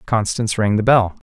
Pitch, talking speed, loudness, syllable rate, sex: 105 Hz, 185 wpm, -17 LUFS, 5.7 syllables/s, male